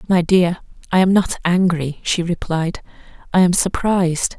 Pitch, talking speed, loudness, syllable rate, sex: 175 Hz, 150 wpm, -17 LUFS, 4.5 syllables/s, female